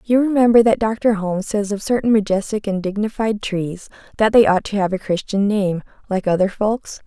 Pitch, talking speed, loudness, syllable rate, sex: 205 Hz, 195 wpm, -18 LUFS, 5.2 syllables/s, female